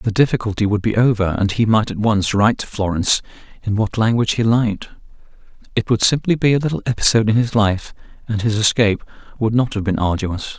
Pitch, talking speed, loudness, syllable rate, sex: 110 Hz, 205 wpm, -18 LUFS, 6.3 syllables/s, male